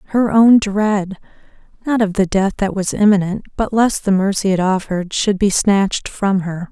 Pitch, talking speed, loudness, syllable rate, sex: 200 Hz, 180 wpm, -16 LUFS, 4.8 syllables/s, female